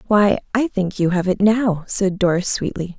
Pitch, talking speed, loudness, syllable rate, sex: 195 Hz, 200 wpm, -19 LUFS, 4.6 syllables/s, female